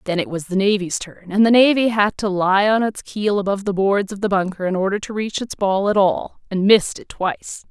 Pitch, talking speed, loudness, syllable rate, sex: 200 Hz, 255 wpm, -19 LUFS, 5.6 syllables/s, female